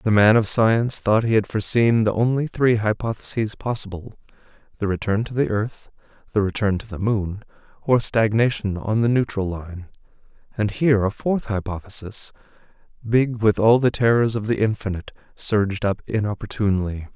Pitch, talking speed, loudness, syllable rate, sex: 110 Hz, 155 wpm, -21 LUFS, 5.3 syllables/s, male